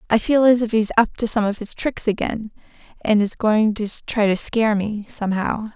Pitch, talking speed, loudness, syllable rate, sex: 215 Hz, 230 wpm, -20 LUFS, 5.3 syllables/s, female